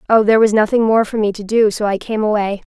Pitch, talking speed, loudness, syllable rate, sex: 215 Hz, 290 wpm, -15 LUFS, 6.5 syllables/s, female